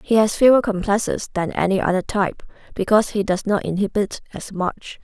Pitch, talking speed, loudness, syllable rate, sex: 200 Hz, 180 wpm, -20 LUFS, 5.6 syllables/s, female